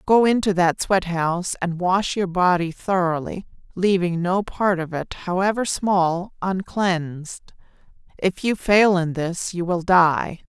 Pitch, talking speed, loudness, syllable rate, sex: 180 Hz, 150 wpm, -21 LUFS, 4.0 syllables/s, female